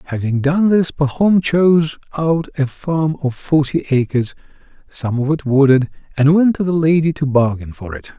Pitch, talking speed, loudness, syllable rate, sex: 145 Hz, 175 wpm, -16 LUFS, 4.7 syllables/s, male